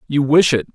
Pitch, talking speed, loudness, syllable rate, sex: 145 Hz, 240 wpm, -15 LUFS, 5.7 syllables/s, male